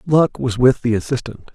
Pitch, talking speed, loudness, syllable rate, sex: 125 Hz, 195 wpm, -18 LUFS, 4.9 syllables/s, male